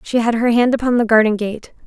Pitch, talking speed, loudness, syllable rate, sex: 230 Hz, 255 wpm, -16 LUFS, 6.0 syllables/s, female